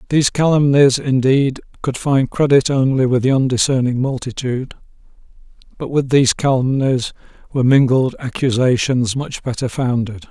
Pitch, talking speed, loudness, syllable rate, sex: 130 Hz, 120 wpm, -16 LUFS, 5.1 syllables/s, male